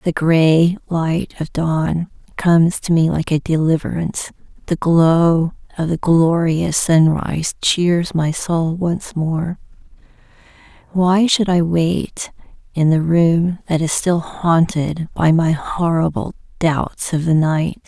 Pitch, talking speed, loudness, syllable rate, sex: 165 Hz, 135 wpm, -17 LUFS, 3.5 syllables/s, female